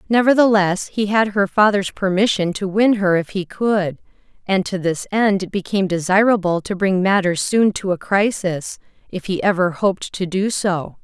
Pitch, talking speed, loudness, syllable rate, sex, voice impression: 195 Hz, 180 wpm, -18 LUFS, 4.8 syllables/s, female, feminine, slightly middle-aged, tensed, slightly hard, clear, fluent, intellectual, calm, reassuring, slightly elegant, lively, sharp